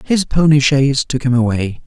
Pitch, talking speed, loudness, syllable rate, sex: 135 Hz, 195 wpm, -14 LUFS, 5.2 syllables/s, male